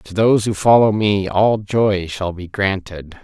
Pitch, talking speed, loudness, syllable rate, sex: 100 Hz, 185 wpm, -17 LUFS, 4.1 syllables/s, male